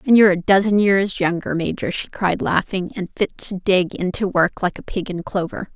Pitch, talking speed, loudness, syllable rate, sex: 190 Hz, 220 wpm, -20 LUFS, 5.1 syllables/s, female